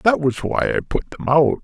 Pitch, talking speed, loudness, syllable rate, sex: 145 Hz, 255 wpm, -20 LUFS, 6.1 syllables/s, male